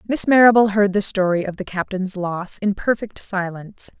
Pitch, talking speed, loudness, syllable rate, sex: 200 Hz, 180 wpm, -19 LUFS, 5.1 syllables/s, female